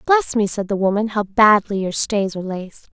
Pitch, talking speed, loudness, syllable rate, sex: 200 Hz, 225 wpm, -18 LUFS, 5.4 syllables/s, female